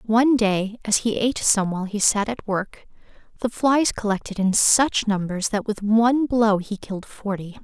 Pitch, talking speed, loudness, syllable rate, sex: 215 Hz, 190 wpm, -21 LUFS, 4.7 syllables/s, female